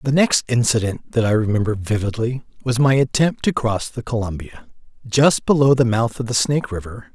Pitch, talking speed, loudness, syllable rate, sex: 120 Hz, 185 wpm, -19 LUFS, 5.3 syllables/s, male